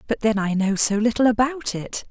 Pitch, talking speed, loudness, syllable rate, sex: 220 Hz, 230 wpm, -21 LUFS, 5.1 syllables/s, female